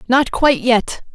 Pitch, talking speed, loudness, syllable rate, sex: 245 Hz, 155 wpm, -15 LUFS, 4.4 syllables/s, female